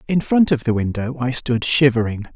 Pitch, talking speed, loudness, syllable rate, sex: 130 Hz, 205 wpm, -18 LUFS, 5.4 syllables/s, male